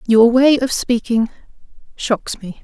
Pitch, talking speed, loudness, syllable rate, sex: 235 Hz, 135 wpm, -16 LUFS, 3.8 syllables/s, female